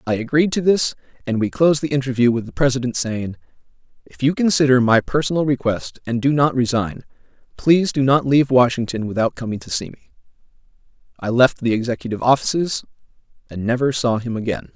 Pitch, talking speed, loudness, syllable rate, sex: 130 Hz, 175 wpm, -19 LUFS, 6.2 syllables/s, male